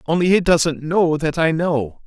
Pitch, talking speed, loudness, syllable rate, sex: 160 Hz, 205 wpm, -18 LUFS, 4.1 syllables/s, male